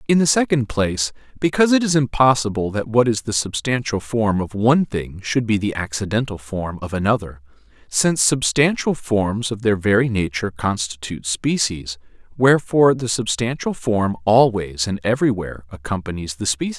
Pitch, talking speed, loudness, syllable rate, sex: 110 Hz, 155 wpm, -19 LUFS, 5.4 syllables/s, male